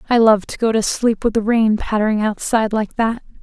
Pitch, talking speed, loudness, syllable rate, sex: 220 Hz, 230 wpm, -17 LUFS, 5.6 syllables/s, female